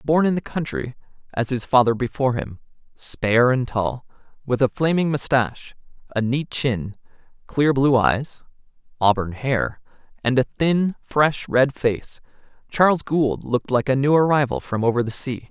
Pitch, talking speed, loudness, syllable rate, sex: 130 Hz, 160 wpm, -21 LUFS, 4.6 syllables/s, male